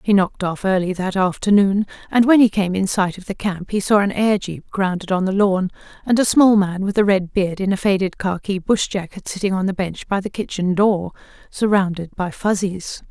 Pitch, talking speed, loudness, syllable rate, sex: 195 Hz, 220 wpm, -19 LUFS, 5.2 syllables/s, female